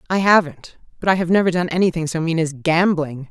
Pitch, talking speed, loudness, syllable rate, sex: 170 Hz, 220 wpm, -18 LUFS, 5.9 syllables/s, female